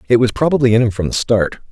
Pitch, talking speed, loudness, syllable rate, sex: 120 Hz, 280 wpm, -15 LUFS, 6.9 syllables/s, male